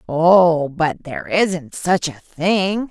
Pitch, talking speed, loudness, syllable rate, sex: 170 Hz, 145 wpm, -17 LUFS, 3.0 syllables/s, female